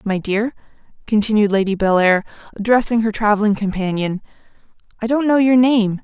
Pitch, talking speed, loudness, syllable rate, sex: 215 Hz, 140 wpm, -17 LUFS, 5.6 syllables/s, female